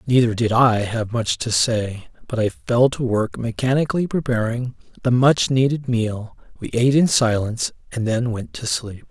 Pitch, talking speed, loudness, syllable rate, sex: 120 Hz, 180 wpm, -20 LUFS, 4.7 syllables/s, male